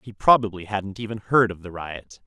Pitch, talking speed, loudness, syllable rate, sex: 100 Hz, 210 wpm, -22 LUFS, 5.1 syllables/s, male